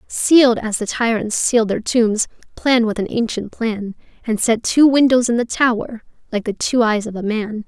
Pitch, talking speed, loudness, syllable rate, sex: 230 Hz, 205 wpm, -17 LUFS, 5.0 syllables/s, female